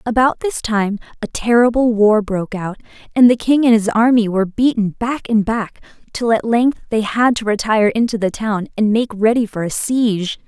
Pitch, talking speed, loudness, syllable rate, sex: 220 Hz, 200 wpm, -16 LUFS, 5.1 syllables/s, female